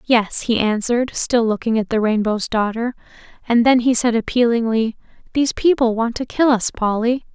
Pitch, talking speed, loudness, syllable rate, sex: 235 Hz, 170 wpm, -18 LUFS, 5.2 syllables/s, female